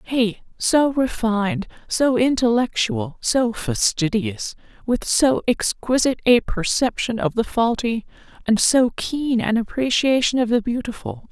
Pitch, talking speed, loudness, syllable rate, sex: 235 Hz, 120 wpm, -20 LUFS, 4.1 syllables/s, female